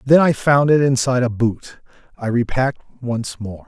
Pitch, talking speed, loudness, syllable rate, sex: 125 Hz, 180 wpm, -18 LUFS, 4.7 syllables/s, male